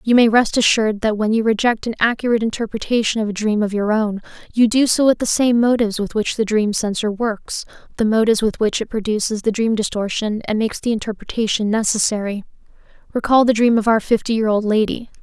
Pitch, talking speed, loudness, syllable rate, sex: 220 Hz, 210 wpm, -18 LUFS, 6.1 syllables/s, female